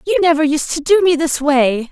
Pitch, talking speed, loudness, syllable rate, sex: 295 Hz, 250 wpm, -14 LUFS, 5.3 syllables/s, female